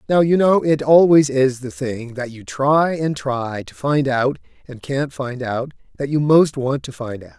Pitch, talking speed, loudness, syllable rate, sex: 135 Hz, 220 wpm, -18 LUFS, 4.2 syllables/s, male